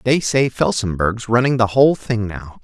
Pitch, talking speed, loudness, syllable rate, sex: 115 Hz, 180 wpm, -17 LUFS, 4.8 syllables/s, male